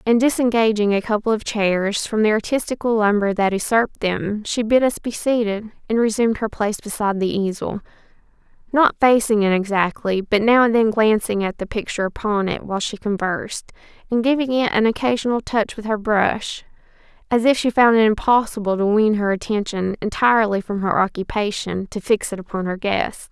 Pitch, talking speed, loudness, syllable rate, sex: 215 Hz, 180 wpm, -19 LUFS, 5.4 syllables/s, female